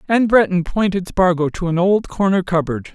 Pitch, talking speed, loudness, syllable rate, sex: 185 Hz, 185 wpm, -17 LUFS, 5.0 syllables/s, male